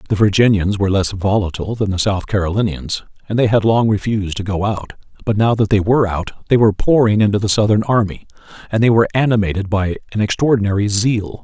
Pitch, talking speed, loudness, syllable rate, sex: 105 Hz, 200 wpm, -16 LUFS, 6.4 syllables/s, male